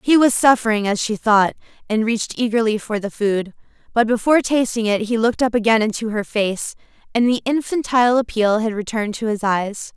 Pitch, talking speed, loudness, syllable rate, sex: 225 Hz, 195 wpm, -19 LUFS, 5.7 syllables/s, female